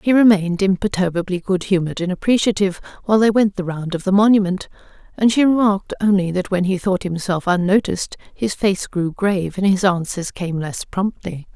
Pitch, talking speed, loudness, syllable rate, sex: 190 Hz, 180 wpm, -18 LUFS, 5.8 syllables/s, female